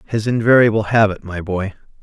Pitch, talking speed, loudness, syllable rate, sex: 105 Hz, 150 wpm, -16 LUFS, 5.4 syllables/s, male